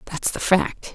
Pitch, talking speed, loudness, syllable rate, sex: 175 Hz, 190 wpm, -22 LUFS, 3.8 syllables/s, female